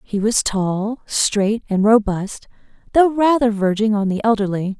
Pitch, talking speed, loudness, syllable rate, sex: 215 Hz, 150 wpm, -18 LUFS, 4.2 syllables/s, female